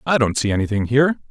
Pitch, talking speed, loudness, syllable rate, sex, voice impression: 125 Hz, 230 wpm, -18 LUFS, 7.6 syllables/s, male, very masculine, very adult-like, slightly old, very thick, tensed, very powerful, slightly bright, very soft, muffled, very fluent, slightly raspy, very cool, very intellectual, sincere, very calm, very mature, very friendly, very reassuring, very unique, elegant, wild, very sweet, lively, very kind